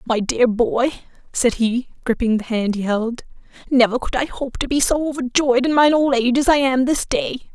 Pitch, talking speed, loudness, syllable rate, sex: 250 Hz, 215 wpm, -19 LUFS, 5.1 syllables/s, female